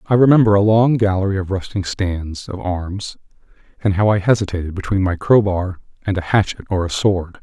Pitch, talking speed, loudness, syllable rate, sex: 95 Hz, 185 wpm, -18 LUFS, 5.3 syllables/s, male